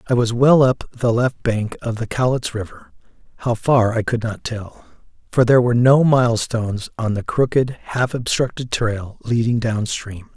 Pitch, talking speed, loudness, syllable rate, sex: 115 Hz, 175 wpm, -19 LUFS, 4.7 syllables/s, male